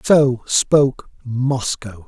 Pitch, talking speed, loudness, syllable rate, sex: 125 Hz, 85 wpm, -18 LUFS, 2.8 syllables/s, male